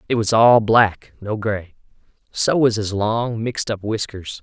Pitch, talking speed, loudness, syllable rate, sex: 110 Hz, 175 wpm, -19 LUFS, 4.1 syllables/s, male